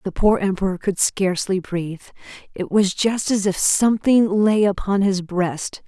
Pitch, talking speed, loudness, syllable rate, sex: 195 Hz, 165 wpm, -19 LUFS, 4.6 syllables/s, female